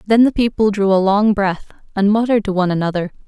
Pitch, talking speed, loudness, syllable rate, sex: 205 Hz, 220 wpm, -16 LUFS, 6.4 syllables/s, female